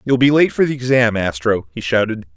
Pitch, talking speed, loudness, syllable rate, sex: 110 Hz, 230 wpm, -16 LUFS, 5.6 syllables/s, male